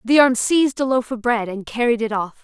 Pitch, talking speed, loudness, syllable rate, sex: 240 Hz, 270 wpm, -19 LUFS, 5.7 syllables/s, female